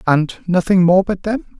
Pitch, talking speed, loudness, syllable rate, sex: 185 Hz, 190 wpm, -16 LUFS, 4.4 syllables/s, male